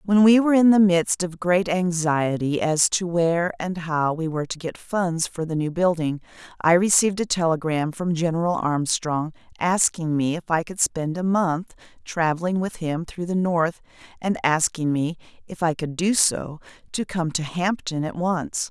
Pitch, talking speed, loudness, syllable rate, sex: 170 Hz, 185 wpm, -22 LUFS, 4.6 syllables/s, female